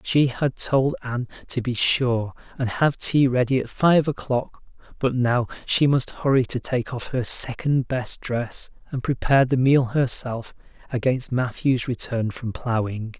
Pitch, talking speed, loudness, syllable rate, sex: 125 Hz, 165 wpm, -22 LUFS, 4.2 syllables/s, male